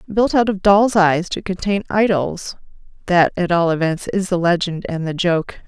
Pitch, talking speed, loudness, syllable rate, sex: 185 Hz, 180 wpm, -17 LUFS, 4.5 syllables/s, female